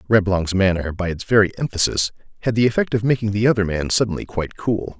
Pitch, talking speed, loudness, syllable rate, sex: 100 Hz, 205 wpm, -20 LUFS, 6.3 syllables/s, male